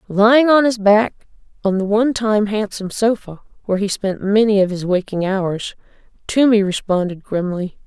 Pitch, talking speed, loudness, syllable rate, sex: 205 Hz, 150 wpm, -17 LUFS, 5.2 syllables/s, female